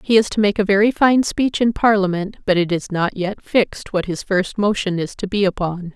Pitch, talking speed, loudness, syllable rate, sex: 200 Hz, 240 wpm, -18 LUFS, 5.2 syllables/s, female